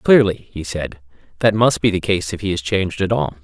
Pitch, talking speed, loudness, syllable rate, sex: 95 Hz, 245 wpm, -18 LUFS, 5.4 syllables/s, male